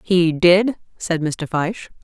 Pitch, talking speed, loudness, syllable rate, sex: 175 Hz, 145 wpm, -18 LUFS, 3.7 syllables/s, female